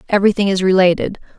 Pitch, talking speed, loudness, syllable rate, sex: 190 Hz, 130 wpm, -15 LUFS, 7.6 syllables/s, female